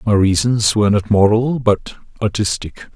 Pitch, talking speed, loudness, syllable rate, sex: 105 Hz, 140 wpm, -16 LUFS, 4.7 syllables/s, male